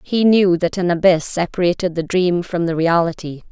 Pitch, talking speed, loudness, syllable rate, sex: 175 Hz, 190 wpm, -17 LUFS, 5.0 syllables/s, female